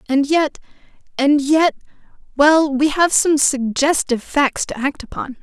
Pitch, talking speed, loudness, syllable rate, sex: 285 Hz, 120 wpm, -17 LUFS, 4.2 syllables/s, female